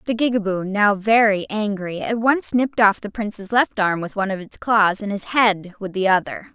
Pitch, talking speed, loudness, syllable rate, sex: 210 Hz, 220 wpm, -19 LUFS, 5.1 syllables/s, female